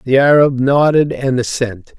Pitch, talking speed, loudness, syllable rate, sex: 135 Hz, 150 wpm, -13 LUFS, 4.4 syllables/s, male